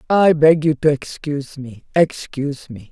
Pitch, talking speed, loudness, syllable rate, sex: 145 Hz, 165 wpm, -18 LUFS, 4.6 syllables/s, female